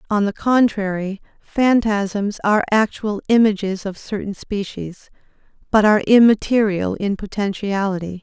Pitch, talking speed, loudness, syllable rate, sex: 205 Hz, 110 wpm, -18 LUFS, 4.6 syllables/s, female